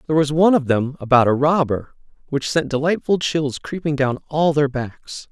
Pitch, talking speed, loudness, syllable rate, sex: 145 Hz, 190 wpm, -19 LUFS, 5.1 syllables/s, male